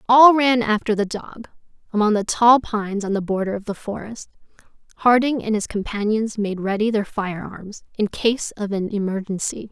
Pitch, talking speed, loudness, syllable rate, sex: 215 Hz, 175 wpm, -20 LUFS, 5.0 syllables/s, female